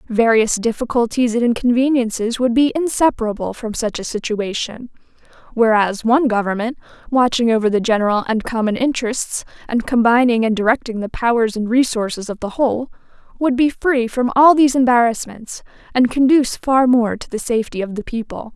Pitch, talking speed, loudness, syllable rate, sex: 235 Hz, 160 wpm, -17 LUFS, 5.6 syllables/s, female